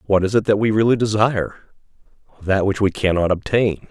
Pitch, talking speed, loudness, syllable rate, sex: 100 Hz, 170 wpm, -18 LUFS, 5.9 syllables/s, male